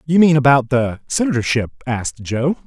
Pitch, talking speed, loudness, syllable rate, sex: 135 Hz, 160 wpm, -17 LUFS, 5.3 syllables/s, male